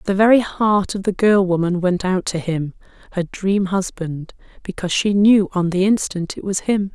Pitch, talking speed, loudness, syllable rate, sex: 190 Hz, 180 wpm, -18 LUFS, 4.9 syllables/s, female